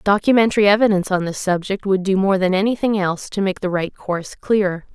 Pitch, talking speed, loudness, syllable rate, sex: 195 Hz, 205 wpm, -18 LUFS, 6.0 syllables/s, female